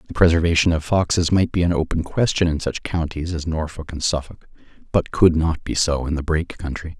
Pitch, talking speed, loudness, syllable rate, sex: 80 Hz, 215 wpm, -20 LUFS, 5.7 syllables/s, male